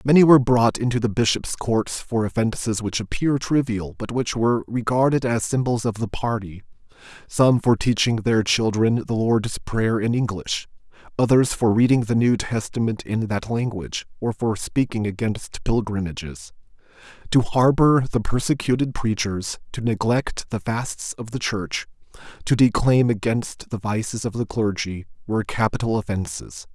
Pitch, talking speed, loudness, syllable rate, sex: 115 Hz, 155 wpm, -22 LUFS, 4.7 syllables/s, male